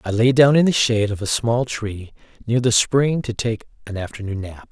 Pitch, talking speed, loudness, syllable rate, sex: 115 Hz, 230 wpm, -19 LUFS, 5.1 syllables/s, male